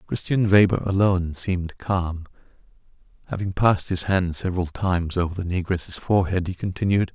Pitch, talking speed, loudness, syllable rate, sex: 90 Hz, 145 wpm, -23 LUFS, 5.5 syllables/s, male